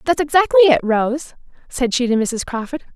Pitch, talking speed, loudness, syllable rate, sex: 270 Hz, 185 wpm, -17 LUFS, 5.3 syllables/s, female